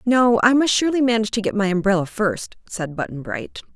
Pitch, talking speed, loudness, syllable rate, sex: 215 Hz, 210 wpm, -20 LUFS, 5.9 syllables/s, female